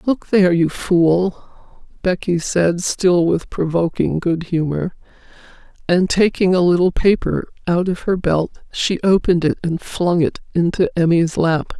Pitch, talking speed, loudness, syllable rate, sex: 175 Hz, 150 wpm, -17 LUFS, 4.1 syllables/s, female